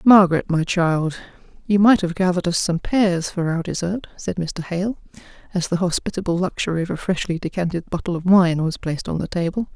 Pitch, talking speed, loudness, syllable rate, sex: 180 Hz, 195 wpm, -21 LUFS, 5.6 syllables/s, female